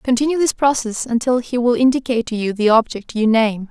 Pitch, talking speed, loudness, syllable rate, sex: 235 Hz, 210 wpm, -17 LUFS, 5.7 syllables/s, female